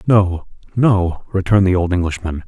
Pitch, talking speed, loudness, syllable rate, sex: 95 Hz, 120 wpm, -17 LUFS, 5.0 syllables/s, male